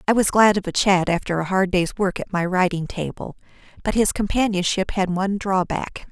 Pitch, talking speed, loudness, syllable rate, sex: 190 Hz, 205 wpm, -21 LUFS, 5.3 syllables/s, female